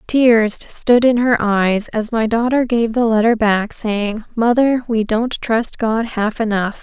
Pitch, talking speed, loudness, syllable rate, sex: 225 Hz, 175 wpm, -16 LUFS, 3.7 syllables/s, female